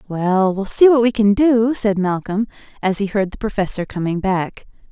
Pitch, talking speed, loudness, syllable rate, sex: 205 Hz, 195 wpm, -17 LUFS, 4.8 syllables/s, female